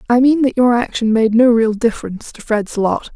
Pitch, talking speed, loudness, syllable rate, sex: 230 Hz, 230 wpm, -15 LUFS, 5.4 syllables/s, female